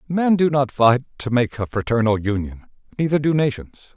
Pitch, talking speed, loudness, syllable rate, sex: 125 Hz, 180 wpm, -20 LUFS, 5.4 syllables/s, male